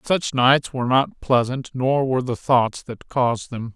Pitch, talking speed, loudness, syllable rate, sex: 125 Hz, 190 wpm, -20 LUFS, 4.4 syllables/s, male